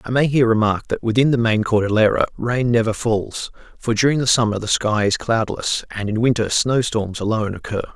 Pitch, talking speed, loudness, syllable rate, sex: 115 Hz, 205 wpm, -19 LUFS, 5.6 syllables/s, male